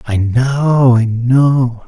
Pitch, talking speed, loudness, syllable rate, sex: 125 Hz, 130 wpm, -12 LUFS, 2.4 syllables/s, male